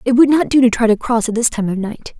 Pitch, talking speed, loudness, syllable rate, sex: 235 Hz, 355 wpm, -15 LUFS, 6.3 syllables/s, female